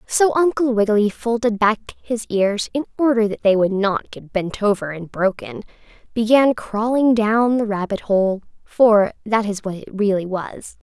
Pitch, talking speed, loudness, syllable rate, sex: 215 Hz, 170 wpm, -19 LUFS, 4.5 syllables/s, female